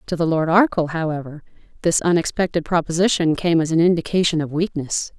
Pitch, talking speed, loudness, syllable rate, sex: 165 Hz, 160 wpm, -19 LUFS, 5.8 syllables/s, female